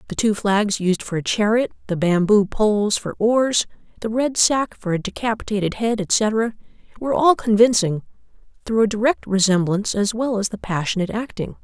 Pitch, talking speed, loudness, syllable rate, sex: 210 Hz, 170 wpm, -20 LUFS, 5.2 syllables/s, female